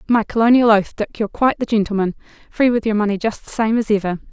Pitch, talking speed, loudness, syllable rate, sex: 215 Hz, 220 wpm, -18 LUFS, 6.8 syllables/s, female